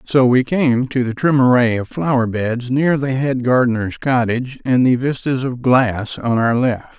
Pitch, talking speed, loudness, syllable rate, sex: 125 Hz, 195 wpm, -17 LUFS, 4.4 syllables/s, male